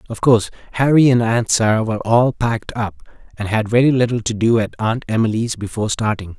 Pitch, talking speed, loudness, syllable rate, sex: 115 Hz, 195 wpm, -17 LUFS, 6.1 syllables/s, male